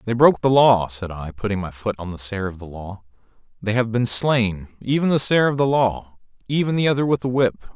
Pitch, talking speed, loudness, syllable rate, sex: 110 Hz, 230 wpm, -20 LUFS, 5.6 syllables/s, male